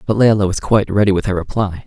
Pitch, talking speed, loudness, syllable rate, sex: 100 Hz, 255 wpm, -16 LUFS, 6.9 syllables/s, male